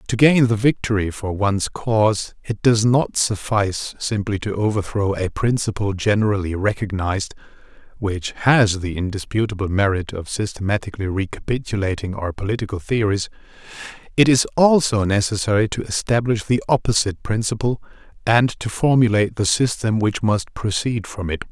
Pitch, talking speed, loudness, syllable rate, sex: 105 Hz, 135 wpm, -20 LUFS, 5.2 syllables/s, male